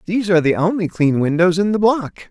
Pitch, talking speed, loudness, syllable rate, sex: 180 Hz, 235 wpm, -16 LUFS, 6.3 syllables/s, male